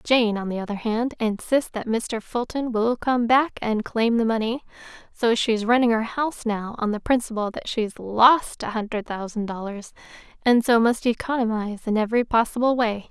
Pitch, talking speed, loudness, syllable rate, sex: 230 Hz, 185 wpm, -23 LUFS, 5.0 syllables/s, female